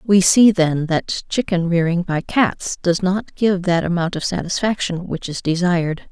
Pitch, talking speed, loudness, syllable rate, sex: 180 Hz, 175 wpm, -18 LUFS, 4.4 syllables/s, female